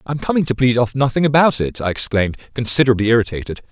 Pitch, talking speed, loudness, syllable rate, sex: 125 Hz, 195 wpm, -17 LUFS, 7.1 syllables/s, male